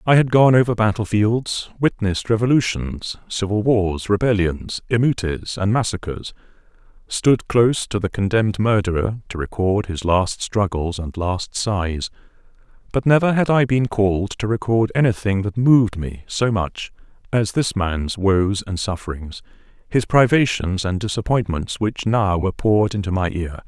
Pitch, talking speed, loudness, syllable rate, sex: 105 Hz, 145 wpm, -20 LUFS, 4.7 syllables/s, male